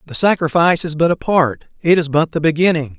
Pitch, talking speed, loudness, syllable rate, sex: 160 Hz, 200 wpm, -16 LUFS, 6.0 syllables/s, male